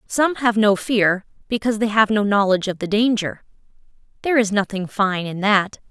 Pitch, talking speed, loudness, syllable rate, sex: 210 Hz, 185 wpm, -19 LUFS, 5.3 syllables/s, female